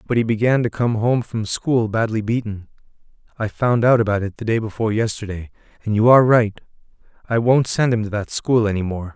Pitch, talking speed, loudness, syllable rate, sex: 110 Hz, 210 wpm, -19 LUFS, 5.8 syllables/s, male